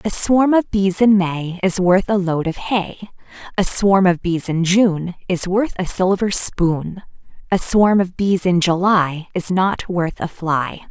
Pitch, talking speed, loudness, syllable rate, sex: 185 Hz, 185 wpm, -17 LUFS, 3.8 syllables/s, female